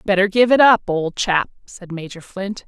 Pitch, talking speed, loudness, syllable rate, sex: 195 Hz, 200 wpm, -16 LUFS, 4.7 syllables/s, female